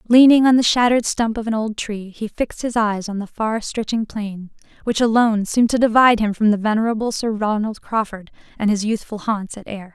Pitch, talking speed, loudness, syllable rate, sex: 220 Hz, 215 wpm, -19 LUFS, 5.7 syllables/s, female